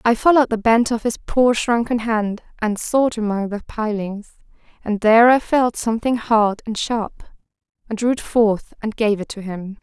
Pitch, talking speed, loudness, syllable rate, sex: 225 Hz, 190 wpm, -19 LUFS, 4.7 syllables/s, female